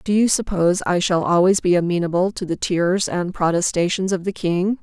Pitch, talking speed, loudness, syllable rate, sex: 185 Hz, 200 wpm, -19 LUFS, 5.3 syllables/s, female